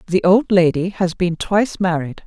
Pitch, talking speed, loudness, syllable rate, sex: 185 Hz, 185 wpm, -17 LUFS, 4.8 syllables/s, female